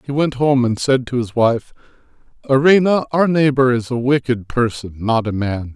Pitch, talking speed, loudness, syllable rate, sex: 125 Hz, 190 wpm, -17 LUFS, 4.8 syllables/s, male